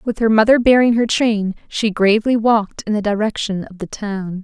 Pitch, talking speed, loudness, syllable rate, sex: 215 Hz, 205 wpm, -16 LUFS, 5.2 syllables/s, female